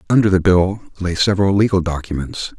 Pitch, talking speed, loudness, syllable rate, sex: 95 Hz, 160 wpm, -17 LUFS, 6.1 syllables/s, male